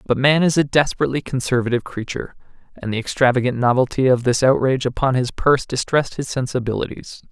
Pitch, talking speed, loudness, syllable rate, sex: 130 Hz, 165 wpm, -19 LUFS, 6.7 syllables/s, male